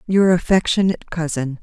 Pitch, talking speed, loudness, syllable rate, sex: 170 Hz, 110 wpm, -18 LUFS, 5.7 syllables/s, female